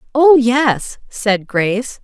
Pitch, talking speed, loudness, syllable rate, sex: 240 Hz, 120 wpm, -14 LUFS, 3.1 syllables/s, female